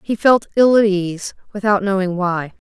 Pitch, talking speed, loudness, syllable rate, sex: 200 Hz, 175 wpm, -16 LUFS, 4.5 syllables/s, female